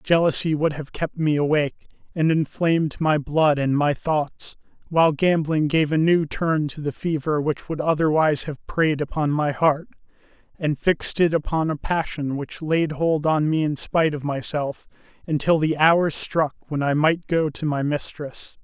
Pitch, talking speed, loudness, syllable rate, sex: 155 Hz, 180 wpm, -22 LUFS, 4.6 syllables/s, male